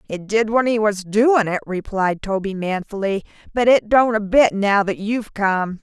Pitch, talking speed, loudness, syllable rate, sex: 205 Hz, 195 wpm, -19 LUFS, 4.5 syllables/s, female